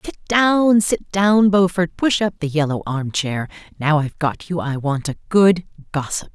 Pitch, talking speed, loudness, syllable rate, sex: 170 Hz, 170 wpm, -18 LUFS, 4.5 syllables/s, female